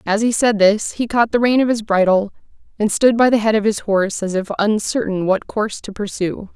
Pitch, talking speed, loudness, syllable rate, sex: 210 Hz, 240 wpm, -17 LUFS, 5.5 syllables/s, female